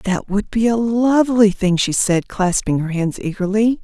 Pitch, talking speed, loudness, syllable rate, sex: 205 Hz, 190 wpm, -17 LUFS, 4.6 syllables/s, female